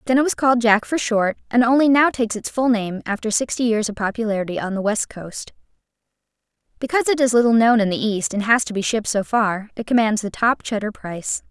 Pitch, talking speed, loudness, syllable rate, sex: 225 Hz, 230 wpm, -19 LUFS, 6.1 syllables/s, female